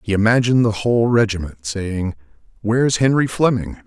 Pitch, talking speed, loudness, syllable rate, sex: 110 Hz, 140 wpm, -18 LUFS, 5.5 syllables/s, male